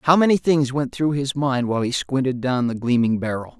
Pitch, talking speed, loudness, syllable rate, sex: 135 Hz, 235 wpm, -21 LUFS, 5.5 syllables/s, male